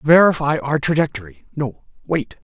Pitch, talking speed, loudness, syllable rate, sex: 140 Hz, 70 wpm, -19 LUFS, 4.9 syllables/s, male